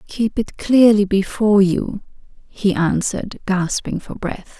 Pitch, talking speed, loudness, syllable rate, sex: 200 Hz, 130 wpm, -18 LUFS, 4.1 syllables/s, female